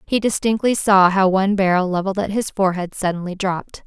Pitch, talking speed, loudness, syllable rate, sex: 195 Hz, 185 wpm, -18 LUFS, 6.2 syllables/s, female